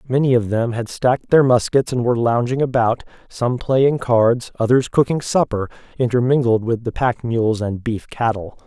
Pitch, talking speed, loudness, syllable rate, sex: 120 Hz, 175 wpm, -18 LUFS, 4.8 syllables/s, male